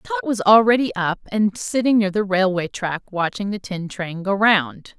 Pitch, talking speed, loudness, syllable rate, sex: 200 Hz, 195 wpm, -20 LUFS, 4.3 syllables/s, female